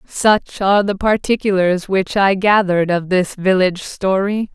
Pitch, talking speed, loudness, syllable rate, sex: 195 Hz, 145 wpm, -16 LUFS, 4.5 syllables/s, female